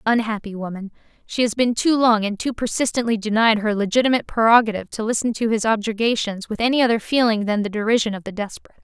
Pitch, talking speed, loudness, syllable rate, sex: 220 Hz, 195 wpm, -20 LUFS, 6.7 syllables/s, female